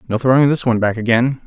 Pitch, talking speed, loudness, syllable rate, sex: 125 Hz, 245 wpm, -15 LUFS, 7.1 syllables/s, male